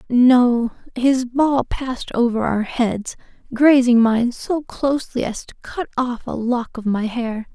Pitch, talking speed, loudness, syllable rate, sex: 245 Hz, 160 wpm, -19 LUFS, 3.8 syllables/s, female